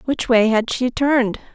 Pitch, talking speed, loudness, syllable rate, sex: 240 Hz, 195 wpm, -18 LUFS, 4.7 syllables/s, female